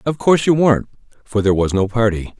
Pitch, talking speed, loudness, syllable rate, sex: 115 Hz, 225 wpm, -16 LUFS, 6.8 syllables/s, male